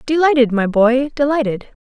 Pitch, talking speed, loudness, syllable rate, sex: 255 Hz, 130 wpm, -15 LUFS, 5.0 syllables/s, female